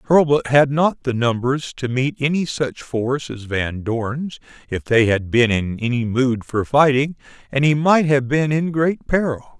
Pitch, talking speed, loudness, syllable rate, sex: 135 Hz, 190 wpm, -19 LUFS, 4.2 syllables/s, male